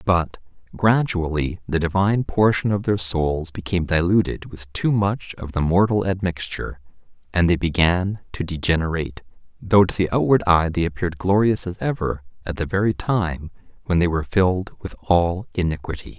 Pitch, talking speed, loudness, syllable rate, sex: 90 Hz, 160 wpm, -21 LUFS, 5.2 syllables/s, male